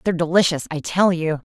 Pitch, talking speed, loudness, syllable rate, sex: 170 Hz, 200 wpm, -19 LUFS, 6.2 syllables/s, female